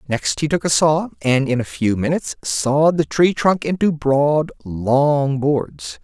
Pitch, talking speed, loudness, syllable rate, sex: 140 Hz, 180 wpm, -18 LUFS, 3.9 syllables/s, male